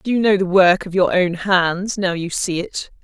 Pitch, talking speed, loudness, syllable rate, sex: 185 Hz, 255 wpm, -17 LUFS, 4.5 syllables/s, female